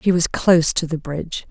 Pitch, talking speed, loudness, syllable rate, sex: 165 Hz, 240 wpm, -18 LUFS, 5.7 syllables/s, female